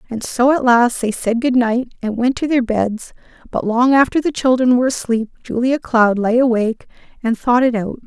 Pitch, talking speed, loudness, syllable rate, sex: 240 Hz, 210 wpm, -16 LUFS, 5.1 syllables/s, female